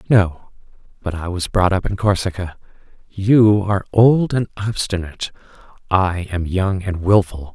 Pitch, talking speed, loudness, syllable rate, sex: 95 Hz, 145 wpm, -18 LUFS, 4.4 syllables/s, male